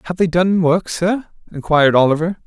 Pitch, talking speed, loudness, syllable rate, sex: 170 Hz, 170 wpm, -16 LUFS, 5.5 syllables/s, male